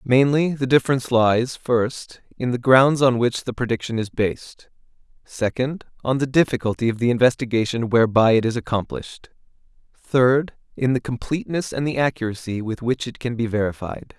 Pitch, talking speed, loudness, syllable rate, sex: 125 Hz, 160 wpm, -21 LUFS, 5.4 syllables/s, male